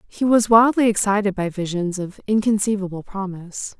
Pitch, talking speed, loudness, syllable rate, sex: 200 Hz, 140 wpm, -20 LUFS, 5.3 syllables/s, female